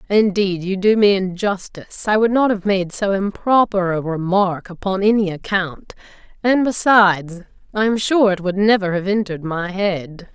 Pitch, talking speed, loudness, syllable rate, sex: 195 Hz, 170 wpm, -18 LUFS, 4.7 syllables/s, female